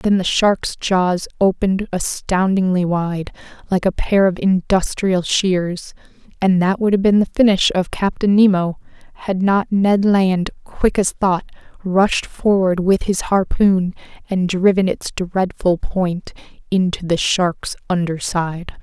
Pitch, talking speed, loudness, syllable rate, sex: 190 Hz, 140 wpm, -17 LUFS, 3.9 syllables/s, female